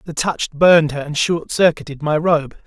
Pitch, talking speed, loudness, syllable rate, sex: 155 Hz, 205 wpm, -17 LUFS, 4.9 syllables/s, male